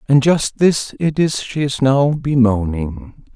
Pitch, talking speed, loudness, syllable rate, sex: 135 Hz, 160 wpm, -16 LUFS, 3.6 syllables/s, male